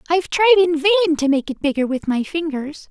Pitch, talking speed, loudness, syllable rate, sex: 270 Hz, 225 wpm, -18 LUFS, 6.5 syllables/s, male